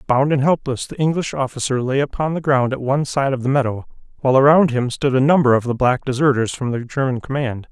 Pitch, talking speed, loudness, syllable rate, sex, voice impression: 135 Hz, 235 wpm, -18 LUFS, 6.1 syllables/s, male, very masculine, very adult-like, middle-aged, thick, slightly relaxed, slightly weak, slightly bright, soft, clear, fluent, slightly raspy, cool, intellectual, very refreshing, sincere, calm, slightly mature, friendly, reassuring, elegant, slightly wild, slightly sweet, lively, kind, slightly modest